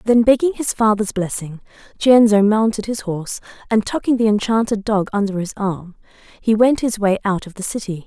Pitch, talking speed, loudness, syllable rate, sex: 210 Hz, 185 wpm, -18 LUFS, 5.3 syllables/s, female